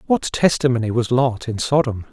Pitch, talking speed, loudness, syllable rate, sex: 125 Hz, 170 wpm, -19 LUFS, 5.3 syllables/s, male